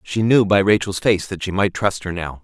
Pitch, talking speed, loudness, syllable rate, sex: 100 Hz, 270 wpm, -18 LUFS, 5.2 syllables/s, male